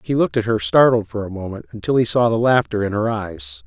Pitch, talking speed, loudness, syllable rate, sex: 115 Hz, 260 wpm, -19 LUFS, 6.0 syllables/s, male